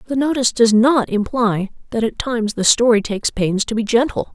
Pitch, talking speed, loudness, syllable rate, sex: 230 Hz, 205 wpm, -17 LUFS, 5.7 syllables/s, female